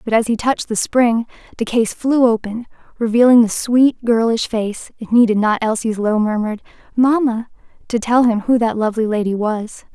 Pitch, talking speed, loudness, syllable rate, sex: 225 Hz, 180 wpm, -16 LUFS, 5.1 syllables/s, female